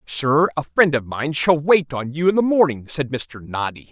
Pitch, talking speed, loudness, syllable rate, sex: 145 Hz, 230 wpm, -19 LUFS, 4.8 syllables/s, male